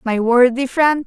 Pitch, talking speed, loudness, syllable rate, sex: 255 Hz, 170 wpm, -15 LUFS, 4.1 syllables/s, female